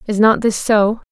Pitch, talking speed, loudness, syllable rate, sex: 215 Hz, 215 wpm, -15 LUFS, 4.4 syllables/s, female